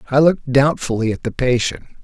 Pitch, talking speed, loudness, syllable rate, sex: 130 Hz, 175 wpm, -18 LUFS, 6.1 syllables/s, male